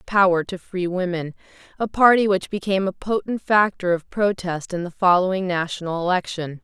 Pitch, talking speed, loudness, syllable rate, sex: 185 Hz, 165 wpm, -21 LUFS, 5.3 syllables/s, female